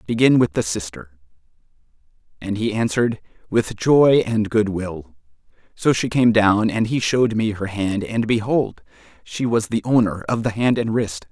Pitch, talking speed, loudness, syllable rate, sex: 110 Hz, 170 wpm, -19 LUFS, 4.6 syllables/s, male